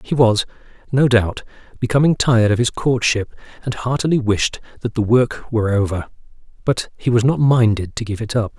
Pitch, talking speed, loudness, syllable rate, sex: 115 Hz, 180 wpm, -18 LUFS, 5.4 syllables/s, male